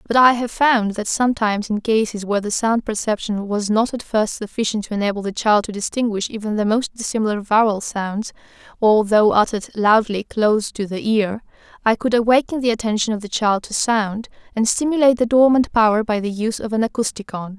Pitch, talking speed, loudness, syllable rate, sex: 220 Hz, 195 wpm, -19 LUFS, 5.7 syllables/s, female